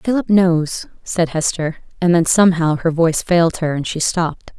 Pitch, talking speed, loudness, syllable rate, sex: 170 Hz, 185 wpm, -17 LUFS, 5.1 syllables/s, female